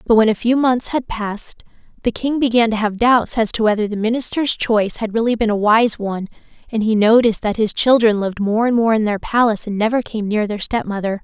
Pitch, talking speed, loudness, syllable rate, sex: 220 Hz, 235 wpm, -17 LUFS, 6.0 syllables/s, female